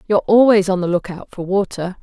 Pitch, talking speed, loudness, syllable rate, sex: 190 Hz, 205 wpm, -16 LUFS, 6.2 syllables/s, female